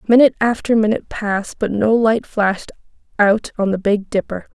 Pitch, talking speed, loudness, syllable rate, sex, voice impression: 215 Hz, 170 wpm, -17 LUFS, 5.6 syllables/s, female, feminine, adult-like, slightly relaxed, slightly weak, bright, soft, slightly muffled, intellectual, calm, friendly, reassuring, elegant, kind, modest